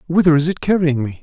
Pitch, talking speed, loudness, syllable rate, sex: 160 Hz, 245 wpm, -16 LUFS, 6.5 syllables/s, male